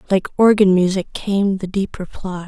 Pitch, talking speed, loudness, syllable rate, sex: 190 Hz, 170 wpm, -17 LUFS, 4.7 syllables/s, female